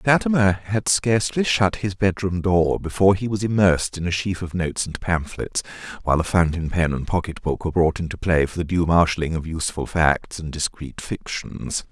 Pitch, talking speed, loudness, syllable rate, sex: 90 Hz, 195 wpm, -22 LUFS, 5.4 syllables/s, male